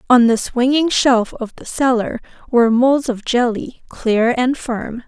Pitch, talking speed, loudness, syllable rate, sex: 245 Hz, 165 wpm, -16 LUFS, 4.0 syllables/s, female